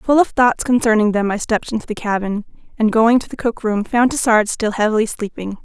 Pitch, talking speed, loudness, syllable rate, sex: 220 Hz, 225 wpm, -17 LUFS, 5.7 syllables/s, female